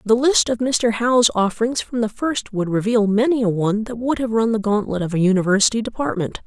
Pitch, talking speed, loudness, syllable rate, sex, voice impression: 220 Hz, 225 wpm, -19 LUFS, 6.0 syllables/s, female, feminine, adult-like, tensed, powerful, slightly bright, clear, fluent, intellectual, calm, elegant, lively, slightly sharp